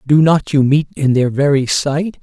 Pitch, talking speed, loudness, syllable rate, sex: 145 Hz, 215 wpm, -14 LUFS, 4.5 syllables/s, male